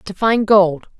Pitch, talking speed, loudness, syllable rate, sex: 200 Hz, 180 wpm, -15 LUFS, 3.5 syllables/s, female